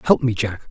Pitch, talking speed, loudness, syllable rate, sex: 120 Hz, 255 wpm, -20 LUFS, 5.3 syllables/s, male